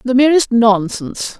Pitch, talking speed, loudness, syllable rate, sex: 235 Hz, 130 wpm, -14 LUFS, 4.7 syllables/s, female